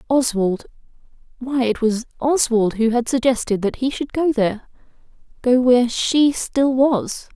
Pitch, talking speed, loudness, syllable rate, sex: 245 Hz, 130 wpm, -19 LUFS, 4.4 syllables/s, female